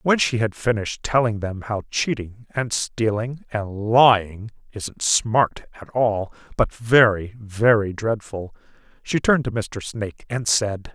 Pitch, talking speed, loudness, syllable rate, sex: 110 Hz, 150 wpm, -21 LUFS, 4.0 syllables/s, male